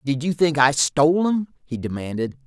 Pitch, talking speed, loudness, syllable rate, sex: 145 Hz, 195 wpm, -21 LUFS, 5.2 syllables/s, male